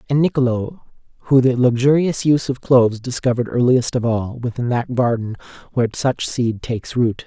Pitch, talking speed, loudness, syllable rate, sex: 125 Hz, 165 wpm, -18 LUFS, 5.5 syllables/s, male